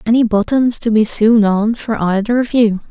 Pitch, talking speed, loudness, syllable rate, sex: 220 Hz, 205 wpm, -14 LUFS, 4.8 syllables/s, female